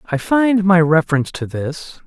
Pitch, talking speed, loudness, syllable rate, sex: 170 Hz, 175 wpm, -16 LUFS, 5.0 syllables/s, male